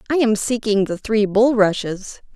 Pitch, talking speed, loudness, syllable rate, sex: 215 Hz, 155 wpm, -18 LUFS, 4.6 syllables/s, female